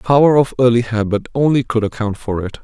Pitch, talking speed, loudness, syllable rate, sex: 120 Hz, 230 wpm, -16 LUFS, 6.2 syllables/s, male